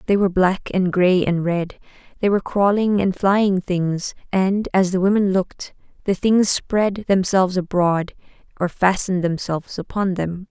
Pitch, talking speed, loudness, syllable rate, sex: 185 Hz, 160 wpm, -19 LUFS, 4.6 syllables/s, female